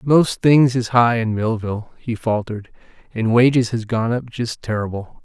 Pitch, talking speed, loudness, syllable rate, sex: 115 Hz, 170 wpm, -19 LUFS, 4.5 syllables/s, male